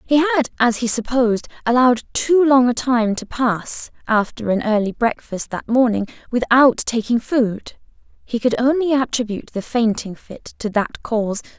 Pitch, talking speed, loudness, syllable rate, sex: 240 Hz, 160 wpm, -18 LUFS, 4.1 syllables/s, female